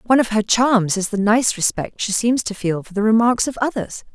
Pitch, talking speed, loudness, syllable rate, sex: 220 Hz, 245 wpm, -18 LUFS, 5.4 syllables/s, female